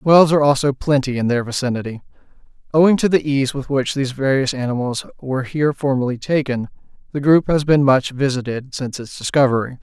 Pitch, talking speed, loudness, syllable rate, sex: 135 Hz, 175 wpm, -18 LUFS, 6.1 syllables/s, male